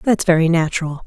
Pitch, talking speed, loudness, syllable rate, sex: 170 Hz, 170 wpm, -17 LUFS, 6.3 syllables/s, female